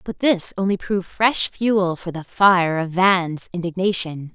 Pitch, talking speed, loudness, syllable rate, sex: 185 Hz, 165 wpm, -20 LUFS, 4.1 syllables/s, female